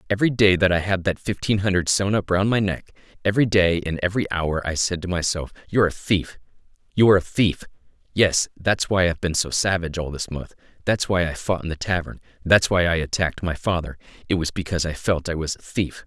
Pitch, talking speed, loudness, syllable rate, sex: 90 Hz, 225 wpm, -22 LUFS, 6.0 syllables/s, male